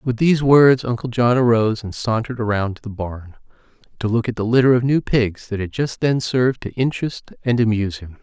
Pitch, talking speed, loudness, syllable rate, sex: 115 Hz, 210 wpm, -19 LUFS, 5.6 syllables/s, male